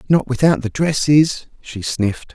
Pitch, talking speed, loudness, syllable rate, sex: 135 Hz, 155 wpm, -17 LUFS, 4.4 syllables/s, male